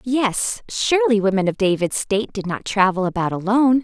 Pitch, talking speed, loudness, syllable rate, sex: 215 Hz, 170 wpm, -19 LUFS, 5.4 syllables/s, female